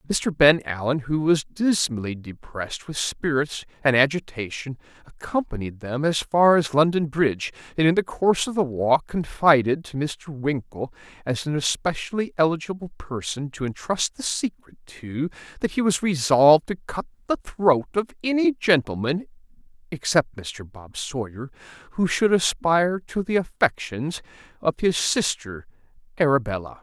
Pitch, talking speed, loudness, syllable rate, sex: 150 Hz, 145 wpm, -23 LUFS, 4.7 syllables/s, male